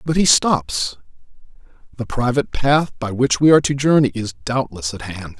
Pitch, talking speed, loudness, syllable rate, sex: 120 Hz, 180 wpm, -18 LUFS, 5.0 syllables/s, male